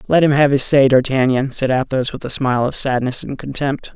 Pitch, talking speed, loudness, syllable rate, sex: 135 Hz, 230 wpm, -16 LUFS, 5.5 syllables/s, male